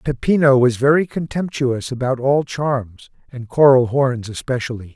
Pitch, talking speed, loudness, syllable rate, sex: 130 Hz, 135 wpm, -17 LUFS, 4.5 syllables/s, male